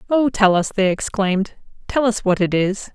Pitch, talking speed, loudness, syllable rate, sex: 205 Hz, 185 wpm, -19 LUFS, 5.2 syllables/s, female